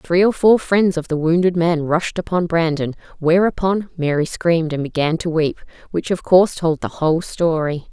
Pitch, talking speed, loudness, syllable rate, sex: 170 Hz, 190 wpm, -18 LUFS, 4.9 syllables/s, female